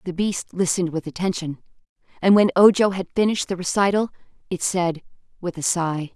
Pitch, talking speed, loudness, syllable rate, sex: 180 Hz, 165 wpm, -21 LUFS, 5.8 syllables/s, female